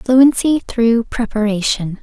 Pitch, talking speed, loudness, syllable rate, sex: 230 Hz, 90 wpm, -15 LUFS, 3.6 syllables/s, female